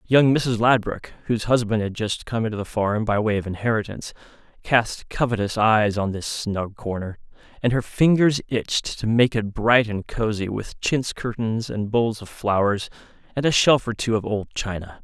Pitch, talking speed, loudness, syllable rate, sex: 110 Hz, 190 wpm, -22 LUFS, 4.8 syllables/s, male